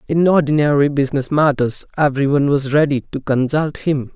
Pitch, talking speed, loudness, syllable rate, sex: 145 Hz, 160 wpm, -17 LUFS, 5.7 syllables/s, male